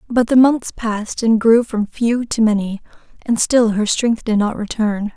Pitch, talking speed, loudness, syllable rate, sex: 225 Hz, 200 wpm, -17 LUFS, 4.4 syllables/s, female